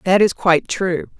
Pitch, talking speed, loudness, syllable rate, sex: 185 Hz, 200 wpm, -17 LUFS, 5.0 syllables/s, female